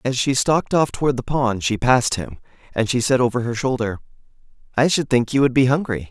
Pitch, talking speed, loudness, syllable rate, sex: 125 Hz, 225 wpm, -19 LUFS, 5.9 syllables/s, male